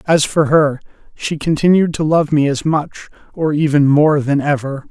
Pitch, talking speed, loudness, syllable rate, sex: 150 Hz, 185 wpm, -15 LUFS, 4.6 syllables/s, male